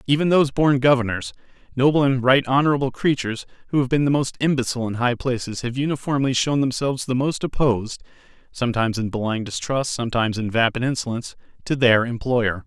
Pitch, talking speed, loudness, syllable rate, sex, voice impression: 125 Hz, 170 wpm, -21 LUFS, 4.8 syllables/s, male, masculine, adult-like, tensed, powerful, slightly bright, slightly clear, cool, intellectual, calm, friendly, wild, lively, light